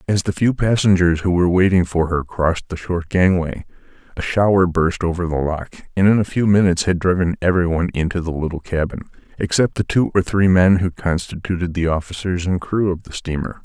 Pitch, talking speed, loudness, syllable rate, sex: 90 Hz, 205 wpm, -18 LUFS, 5.8 syllables/s, male